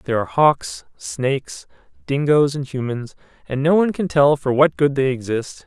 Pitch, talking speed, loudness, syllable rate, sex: 130 Hz, 180 wpm, -19 LUFS, 5.1 syllables/s, male